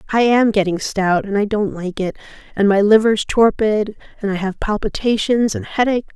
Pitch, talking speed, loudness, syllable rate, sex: 205 Hz, 185 wpm, -17 LUFS, 5.1 syllables/s, female